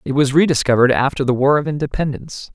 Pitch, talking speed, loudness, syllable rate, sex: 140 Hz, 190 wpm, -16 LUFS, 7.0 syllables/s, male